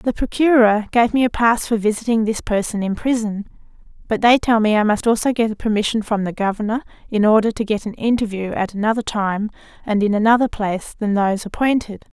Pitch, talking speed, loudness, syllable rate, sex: 220 Hz, 200 wpm, -18 LUFS, 5.8 syllables/s, female